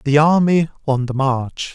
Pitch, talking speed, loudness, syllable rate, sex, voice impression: 145 Hz, 170 wpm, -17 LUFS, 4.2 syllables/s, male, masculine, adult-like, clear, slightly refreshing, sincere, slightly sweet